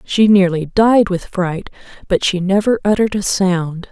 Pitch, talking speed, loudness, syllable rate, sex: 190 Hz, 170 wpm, -15 LUFS, 4.4 syllables/s, female